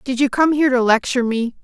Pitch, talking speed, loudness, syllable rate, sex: 255 Hz, 255 wpm, -17 LUFS, 6.8 syllables/s, female